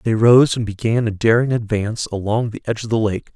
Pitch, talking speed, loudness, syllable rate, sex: 110 Hz, 235 wpm, -18 LUFS, 6.0 syllables/s, male